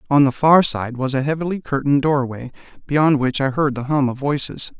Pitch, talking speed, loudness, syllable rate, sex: 140 Hz, 215 wpm, -18 LUFS, 5.5 syllables/s, male